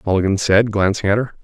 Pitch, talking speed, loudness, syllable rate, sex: 105 Hz, 210 wpm, -17 LUFS, 6.3 syllables/s, male